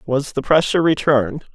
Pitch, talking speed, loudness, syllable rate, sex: 140 Hz, 155 wpm, -17 LUFS, 5.9 syllables/s, male